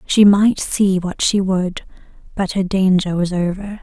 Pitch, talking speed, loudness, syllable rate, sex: 190 Hz, 170 wpm, -17 LUFS, 4.1 syllables/s, female